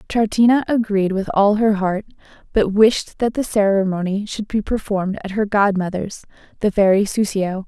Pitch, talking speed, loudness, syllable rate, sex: 205 Hz, 155 wpm, -18 LUFS, 4.9 syllables/s, female